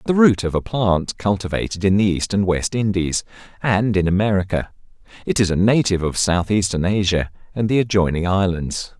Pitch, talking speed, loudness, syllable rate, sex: 100 Hz, 175 wpm, -19 LUFS, 5.3 syllables/s, male